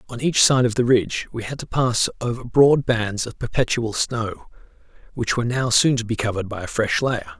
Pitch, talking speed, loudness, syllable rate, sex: 120 Hz, 220 wpm, -21 LUFS, 5.4 syllables/s, male